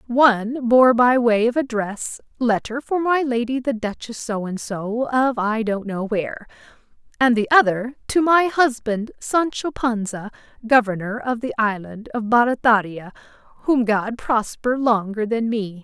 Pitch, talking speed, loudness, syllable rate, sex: 235 Hz, 150 wpm, -20 LUFS, 4.3 syllables/s, female